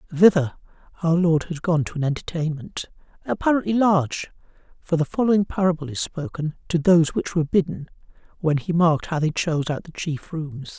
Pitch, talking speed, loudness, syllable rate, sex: 165 Hz, 170 wpm, -22 LUFS, 5.7 syllables/s, male